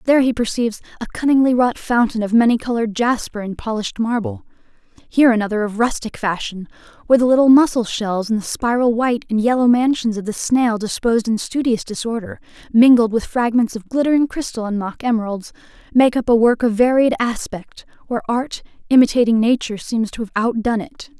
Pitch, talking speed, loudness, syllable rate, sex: 235 Hz, 180 wpm, -17 LUFS, 6.0 syllables/s, female